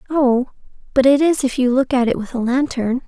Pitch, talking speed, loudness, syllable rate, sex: 260 Hz, 235 wpm, -17 LUFS, 5.4 syllables/s, female